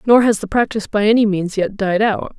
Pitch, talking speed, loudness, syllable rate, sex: 210 Hz, 250 wpm, -16 LUFS, 5.7 syllables/s, female